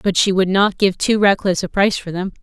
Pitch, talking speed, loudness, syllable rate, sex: 190 Hz, 270 wpm, -16 LUFS, 5.8 syllables/s, female